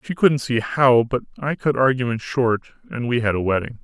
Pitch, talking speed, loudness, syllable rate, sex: 125 Hz, 220 wpm, -20 LUFS, 5.0 syllables/s, male